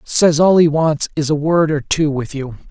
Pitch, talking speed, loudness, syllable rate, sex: 155 Hz, 245 wpm, -15 LUFS, 4.5 syllables/s, male